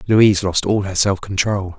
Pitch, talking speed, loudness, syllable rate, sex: 100 Hz, 200 wpm, -17 LUFS, 4.9 syllables/s, male